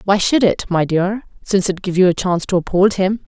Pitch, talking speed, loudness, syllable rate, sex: 190 Hz, 250 wpm, -16 LUFS, 5.6 syllables/s, female